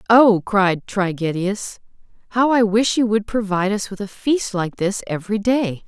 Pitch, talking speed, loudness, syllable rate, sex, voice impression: 205 Hz, 175 wpm, -19 LUFS, 4.6 syllables/s, female, feminine, adult-like, tensed, powerful, clear, intellectual, slightly calm, slightly friendly, elegant, lively, sharp